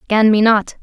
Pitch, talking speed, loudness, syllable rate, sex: 215 Hz, 220 wpm, -13 LUFS, 3.9 syllables/s, female